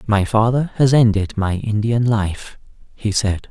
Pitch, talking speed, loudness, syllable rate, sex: 110 Hz, 155 wpm, -18 LUFS, 4.1 syllables/s, male